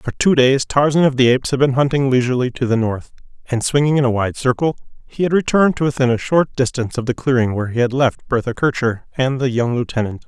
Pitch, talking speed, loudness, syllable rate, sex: 130 Hz, 240 wpm, -17 LUFS, 6.2 syllables/s, male